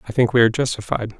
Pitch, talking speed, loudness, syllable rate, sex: 115 Hz, 250 wpm, -19 LUFS, 8.1 syllables/s, male